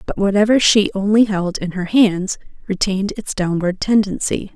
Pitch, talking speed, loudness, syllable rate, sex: 200 Hz, 160 wpm, -17 LUFS, 4.9 syllables/s, female